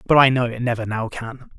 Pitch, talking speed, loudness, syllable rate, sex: 120 Hz, 265 wpm, -20 LUFS, 5.8 syllables/s, male